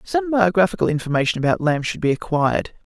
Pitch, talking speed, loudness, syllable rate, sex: 175 Hz, 165 wpm, -20 LUFS, 6.3 syllables/s, male